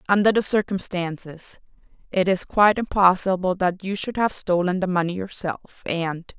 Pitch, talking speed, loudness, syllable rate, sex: 185 Hz, 150 wpm, -22 LUFS, 5.0 syllables/s, female